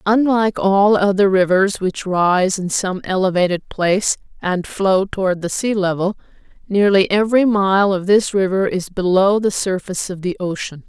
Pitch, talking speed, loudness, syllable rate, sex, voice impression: 195 Hz, 160 wpm, -17 LUFS, 4.7 syllables/s, female, feminine, middle-aged, tensed, powerful, slightly hard, raspy, intellectual, calm, slightly reassuring, elegant, lively, slightly sharp